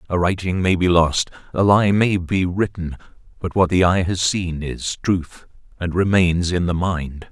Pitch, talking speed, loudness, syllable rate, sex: 90 Hz, 190 wpm, -19 LUFS, 4.3 syllables/s, male